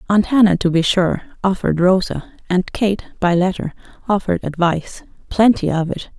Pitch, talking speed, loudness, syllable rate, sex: 185 Hz, 145 wpm, -17 LUFS, 5.5 syllables/s, female